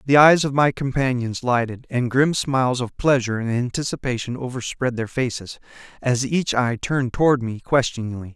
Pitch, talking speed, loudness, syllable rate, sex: 125 Hz, 165 wpm, -21 LUFS, 5.3 syllables/s, male